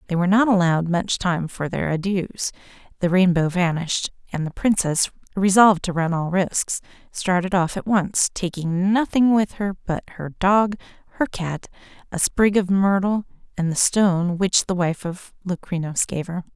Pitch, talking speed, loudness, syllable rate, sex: 185 Hz, 170 wpm, -21 LUFS, 4.7 syllables/s, female